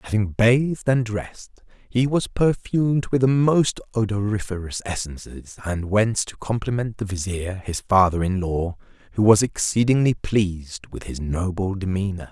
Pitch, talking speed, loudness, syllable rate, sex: 105 Hz, 145 wpm, -22 LUFS, 4.6 syllables/s, male